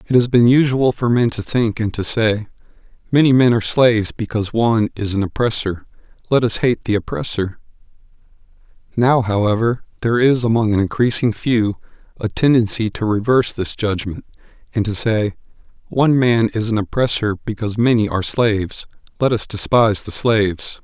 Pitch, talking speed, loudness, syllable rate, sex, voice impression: 115 Hz, 160 wpm, -17 LUFS, 5.5 syllables/s, male, very masculine, very adult-like, slightly old, very thick, slightly tensed, slightly weak, slightly dark, slightly hard, slightly muffled, fluent, slightly raspy, cool, intellectual, sincere, very calm, very mature, friendly, reassuring, unique, slightly elegant, wild, slightly sweet, kind, modest